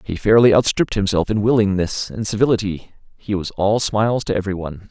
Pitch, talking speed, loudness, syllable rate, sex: 105 Hz, 170 wpm, -18 LUFS, 5.9 syllables/s, male